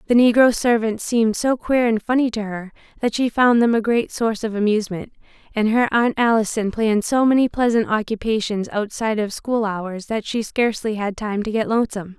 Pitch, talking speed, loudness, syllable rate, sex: 220 Hz, 195 wpm, -20 LUFS, 5.6 syllables/s, female